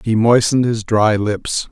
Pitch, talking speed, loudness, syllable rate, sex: 110 Hz, 175 wpm, -15 LUFS, 4.4 syllables/s, male